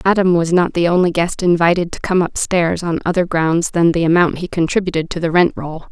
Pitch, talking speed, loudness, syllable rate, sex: 170 Hz, 225 wpm, -16 LUFS, 5.6 syllables/s, female